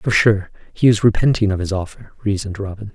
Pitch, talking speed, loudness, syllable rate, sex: 100 Hz, 205 wpm, -18 LUFS, 6.2 syllables/s, male